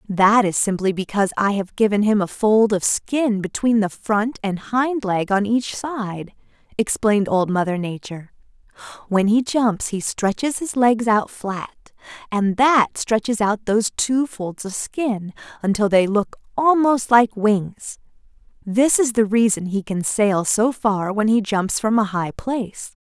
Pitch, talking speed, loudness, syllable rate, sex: 215 Hz, 170 wpm, -19 LUFS, 4.2 syllables/s, female